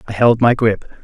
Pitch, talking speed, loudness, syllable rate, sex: 115 Hz, 230 wpm, -14 LUFS, 5.0 syllables/s, male